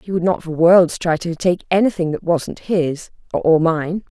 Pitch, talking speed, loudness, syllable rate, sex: 170 Hz, 190 wpm, -17 LUFS, 4.3 syllables/s, female